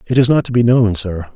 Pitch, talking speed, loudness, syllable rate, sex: 110 Hz, 310 wpm, -14 LUFS, 5.8 syllables/s, male